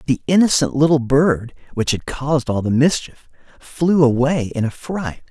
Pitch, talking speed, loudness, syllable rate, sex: 135 Hz, 170 wpm, -18 LUFS, 4.6 syllables/s, male